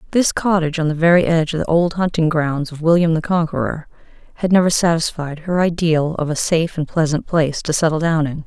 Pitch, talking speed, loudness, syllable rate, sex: 160 Hz, 215 wpm, -17 LUFS, 6.0 syllables/s, female